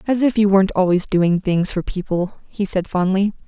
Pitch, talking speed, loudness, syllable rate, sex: 190 Hz, 205 wpm, -18 LUFS, 5.1 syllables/s, female